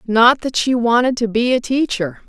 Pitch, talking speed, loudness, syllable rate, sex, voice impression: 235 Hz, 210 wpm, -16 LUFS, 4.7 syllables/s, female, feminine, adult-like, slightly clear, slightly sincere, slightly friendly, slightly reassuring